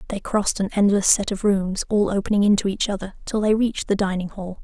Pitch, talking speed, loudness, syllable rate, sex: 200 Hz, 235 wpm, -21 LUFS, 6.2 syllables/s, female